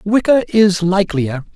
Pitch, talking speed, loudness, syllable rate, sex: 190 Hz, 115 wpm, -15 LUFS, 4.5 syllables/s, male